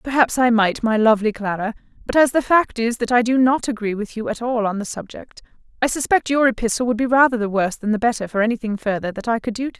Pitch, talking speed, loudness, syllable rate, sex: 230 Hz, 275 wpm, -19 LUFS, 6.6 syllables/s, female